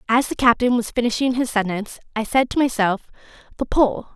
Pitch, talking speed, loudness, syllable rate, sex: 235 Hz, 190 wpm, -20 LUFS, 5.7 syllables/s, female